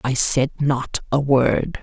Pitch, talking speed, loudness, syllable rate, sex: 135 Hz, 165 wpm, -19 LUFS, 3.3 syllables/s, female